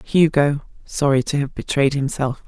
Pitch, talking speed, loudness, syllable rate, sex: 140 Hz, 145 wpm, -19 LUFS, 2.4 syllables/s, female